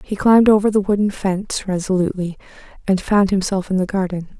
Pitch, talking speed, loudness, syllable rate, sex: 195 Hz, 175 wpm, -18 LUFS, 6.1 syllables/s, female